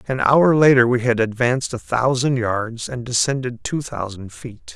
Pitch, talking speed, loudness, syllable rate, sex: 120 Hz, 175 wpm, -19 LUFS, 4.6 syllables/s, male